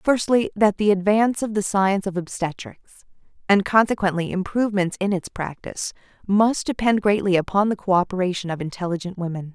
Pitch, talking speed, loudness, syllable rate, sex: 195 Hz, 150 wpm, -21 LUFS, 5.7 syllables/s, female